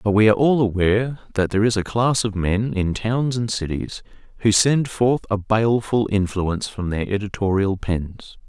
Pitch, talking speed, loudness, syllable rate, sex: 105 Hz, 185 wpm, -20 LUFS, 4.9 syllables/s, male